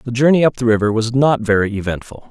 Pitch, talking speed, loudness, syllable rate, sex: 120 Hz, 235 wpm, -16 LUFS, 6.2 syllables/s, male